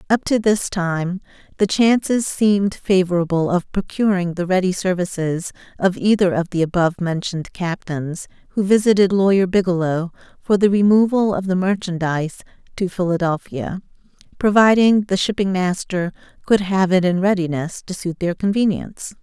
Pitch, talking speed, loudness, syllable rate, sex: 185 Hz, 140 wpm, -19 LUFS, 5.1 syllables/s, female